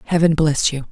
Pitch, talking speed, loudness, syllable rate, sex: 155 Hz, 195 wpm, -17 LUFS, 5.5 syllables/s, female